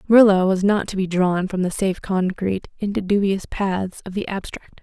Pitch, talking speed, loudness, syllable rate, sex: 190 Hz, 200 wpm, -21 LUFS, 5.3 syllables/s, female